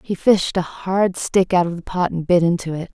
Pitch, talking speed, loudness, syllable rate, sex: 180 Hz, 260 wpm, -19 LUFS, 4.9 syllables/s, female